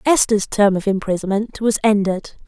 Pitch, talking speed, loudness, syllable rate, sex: 205 Hz, 145 wpm, -18 LUFS, 5.0 syllables/s, female